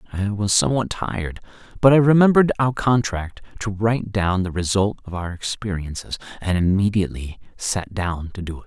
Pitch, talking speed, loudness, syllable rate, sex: 100 Hz, 165 wpm, -21 LUFS, 5.5 syllables/s, male